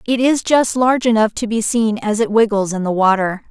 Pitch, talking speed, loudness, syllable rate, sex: 220 Hz, 240 wpm, -16 LUFS, 5.4 syllables/s, female